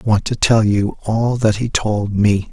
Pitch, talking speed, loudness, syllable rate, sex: 110 Hz, 240 wpm, -17 LUFS, 4.4 syllables/s, male